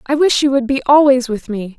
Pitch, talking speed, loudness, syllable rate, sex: 260 Hz, 270 wpm, -14 LUFS, 5.6 syllables/s, female